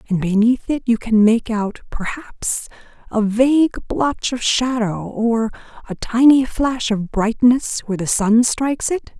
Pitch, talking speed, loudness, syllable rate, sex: 235 Hz, 155 wpm, -18 LUFS, 4.2 syllables/s, female